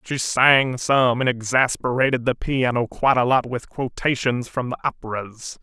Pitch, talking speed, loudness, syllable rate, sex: 125 Hz, 160 wpm, -20 LUFS, 4.6 syllables/s, male